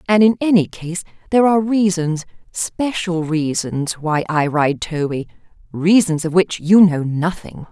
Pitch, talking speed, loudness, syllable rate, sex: 175 Hz, 140 wpm, -17 LUFS, 4.3 syllables/s, female